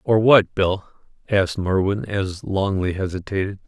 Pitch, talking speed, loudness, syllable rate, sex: 100 Hz, 130 wpm, -21 LUFS, 4.5 syllables/s, male